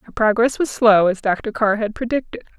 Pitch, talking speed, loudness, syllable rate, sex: 230 Hz, 210 wpm, -18 LUFS, 5.2 syllables/s, female